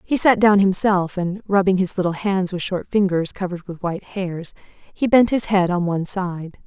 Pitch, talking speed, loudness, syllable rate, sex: 190 Hz, 205 wpm, -20 LUFS, 4.9 syllables/s, female